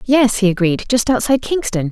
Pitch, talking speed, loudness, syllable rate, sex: 225 Hz, 190 wpm, -16 LUFS, 5.7 syllables/s, female